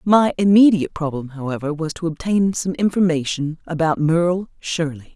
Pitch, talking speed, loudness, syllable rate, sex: 165 Hz, 140 wpm, -19 LUFS, 5.1 syllables/s, female